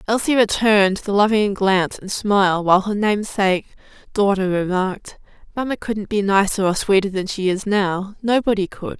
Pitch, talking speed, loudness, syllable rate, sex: 200 Hz, 160 wpm, -19 LUFS, 5.3 syllables/s, female